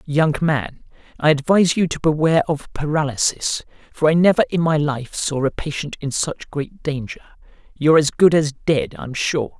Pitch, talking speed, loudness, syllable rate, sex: 150 Hz, 180 wpm, -19 LUFS, 5.0 syllables/s, male